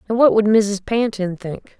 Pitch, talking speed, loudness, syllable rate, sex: 210 Hz, 200 wpm, -17 LUFS, 4.4 syllables/s, female